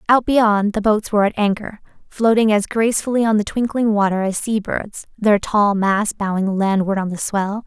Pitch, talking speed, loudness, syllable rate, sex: 210 Hz, 195 wpm, -18 LUFS, 4.9 syllables/s, female